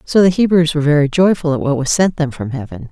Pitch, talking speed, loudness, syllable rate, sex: 155 Hz, 265 wpm, -15 LUFS, 6.4 syllables/s, female